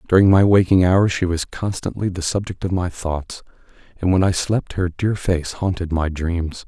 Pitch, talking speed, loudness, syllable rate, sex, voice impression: 90 Hz, 200 wpm, -19 LUFS, 4.7 syllables/s, male, very masculine, adult-like, slightly middle-aged, thick, tensed, powerful, slightly bright, slightly soft, slightly muffled, very fluent, slightly raspy, very cool, very intellectual, slightly refreshing, very sincere, very calm, very mature, very friendly, very reassuring, unique, very elegant, slightly wild, very sweet, slightly lively, very kind